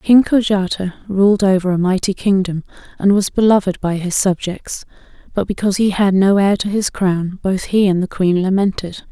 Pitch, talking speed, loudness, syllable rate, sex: 190 Hz, 185 wpm, -16 LUFS, 4.9 syllables/s, female